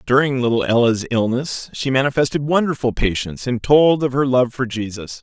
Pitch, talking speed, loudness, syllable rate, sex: 125 Hz, 170 wpm, -18 LUFS, 5.4 syllables/s, male